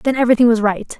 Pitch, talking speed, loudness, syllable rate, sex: 235 Hz, 240 wpm, -15 LUFS, 7.9 syllables/s, female